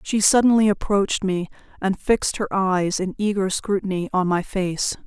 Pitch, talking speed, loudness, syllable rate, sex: 195 Hz, 165 wpm, -21 LUFS, 4.9 syllables/s, female